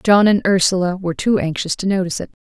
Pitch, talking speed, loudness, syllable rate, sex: 190 Hz, 220 wpm, -17 LUFS, 6.7 syllables/s, female